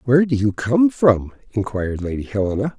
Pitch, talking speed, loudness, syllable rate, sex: 115 Hz, 170 wpm, -19 LUFS, 5.6 syllables/s, male